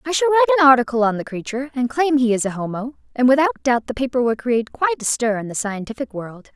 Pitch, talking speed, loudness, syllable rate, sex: 255 Hz, 255 wpm, -19 LUFS, 7.3 syllables/s, female